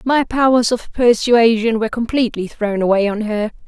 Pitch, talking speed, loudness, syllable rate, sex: 225 Hz, 165 wpm, -16 LUFS, 5.2 syllables/s, female